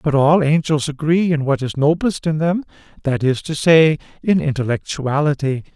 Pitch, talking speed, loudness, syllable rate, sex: 150 Hz, 155 wpm, -17 LUFS, 4.9 syllables/s, male